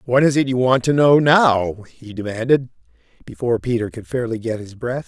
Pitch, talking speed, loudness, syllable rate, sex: 120 Hz, 200 wpm, -18 LUFS, 5.2 syllables/s, male